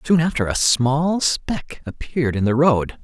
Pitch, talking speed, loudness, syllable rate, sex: 140 Hz, 180 wpm, -19 LUFS, 4.3 syllables/s, male